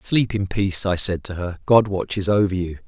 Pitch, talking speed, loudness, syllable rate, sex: 95 Hz, 230 wpm, -21 LUFS, 5.3 syllables/s, male